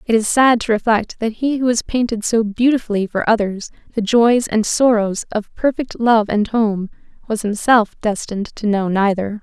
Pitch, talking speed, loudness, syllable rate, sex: 220 Hz, 185 wpm, -17 LUFS, 4.8 syllables/s, female